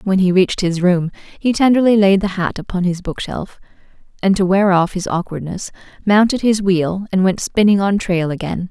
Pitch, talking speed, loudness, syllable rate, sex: 190 Hz, 195 wpm, -16 LUFS, 5.1 syllables/s, female